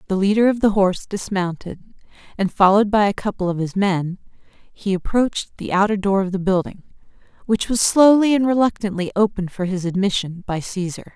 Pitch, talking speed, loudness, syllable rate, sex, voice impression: 200 Hz, 175 wpm, -19 LUFS, 5.6 syllables/s, female, very feminine, adult-like, slightly fluent, slightly calm, elegant, slightly sweet